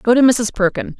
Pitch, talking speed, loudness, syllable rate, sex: 210 Hz, 240 wpm, -15 LUFS, 5.6 syllables/s, female